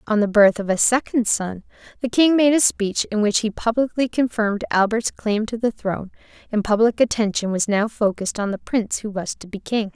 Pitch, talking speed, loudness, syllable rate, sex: 220 Hz, 215 wpm, -20 LUFS, 5.5 syllables/s, female